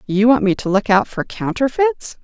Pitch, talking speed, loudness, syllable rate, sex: 225 Hz, 215 wpm, -17 LUFS, 4.9 syllables/s, female